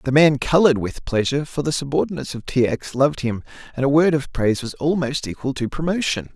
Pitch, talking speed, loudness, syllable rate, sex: 140 Hz, 215 wpm, -20 LUFS, 6.3 syllables/s, male